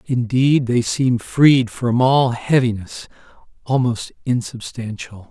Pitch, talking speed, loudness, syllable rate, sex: 120 Hz, 100 wpm, -18 LUFS, 3.6 syllables/s, male